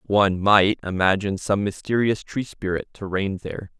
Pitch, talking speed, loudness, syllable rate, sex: 100 Hz, 160 wpm, -22 LUFS, 5.2 syllables/s, male